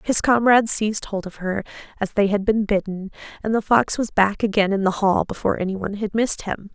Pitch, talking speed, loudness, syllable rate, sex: 205 Hz, 220 wpm, -21 LUFS, 5.9 syllables/s, female